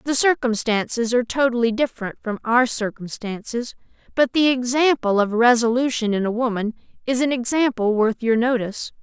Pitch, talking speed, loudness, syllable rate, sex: 240 Hz, 145 wpm, -20 LUFS, 5.3 syllables/s, female